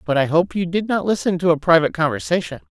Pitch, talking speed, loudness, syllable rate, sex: 170 Hz, 245 wpm, -19 LUFS, 6.7 syllables/s, female